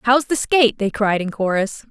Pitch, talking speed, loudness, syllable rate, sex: 225 Hz, 220 wpm, -18 LUFS, 5.2 syllables/s, female